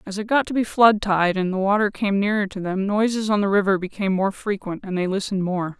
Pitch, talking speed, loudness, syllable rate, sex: 200 Hz, 260 wpm, -21 LUFS, 6.0 syllables/s, female